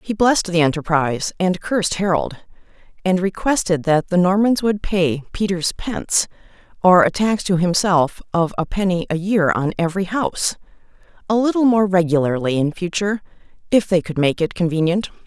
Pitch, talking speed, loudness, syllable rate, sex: 180 Hz, 155 wpm, -18 LUFS, 5.3 syllables/s, female